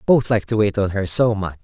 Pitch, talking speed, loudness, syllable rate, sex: 105 Hz, 295 wpm, -18 LUFS, 6.3 syllables/s, male